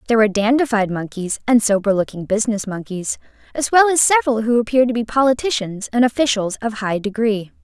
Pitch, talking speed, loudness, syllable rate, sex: 225 Hz, 180 wpm, -18 LUFS, 6.3 syllables/s, female